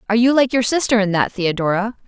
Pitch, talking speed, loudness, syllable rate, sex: 220 Hz, 230 wpm, -17 LUFS, 6.7 syllables/s, female